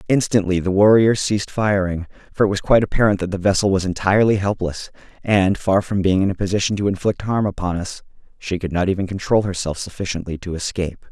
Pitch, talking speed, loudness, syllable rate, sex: 95 Hz, 200 wpm, -19 LUFS, 6.2 syllables/s, male